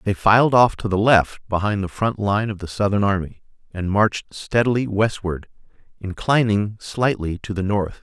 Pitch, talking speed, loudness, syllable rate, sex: 105 Hz, 170 wpm, -20 LUFS, 4.9 syllables/s, male